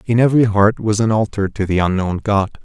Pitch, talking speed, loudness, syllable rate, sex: 105 Hz, 225 wpm, -16 LUFS, 5.9 syllables/s, male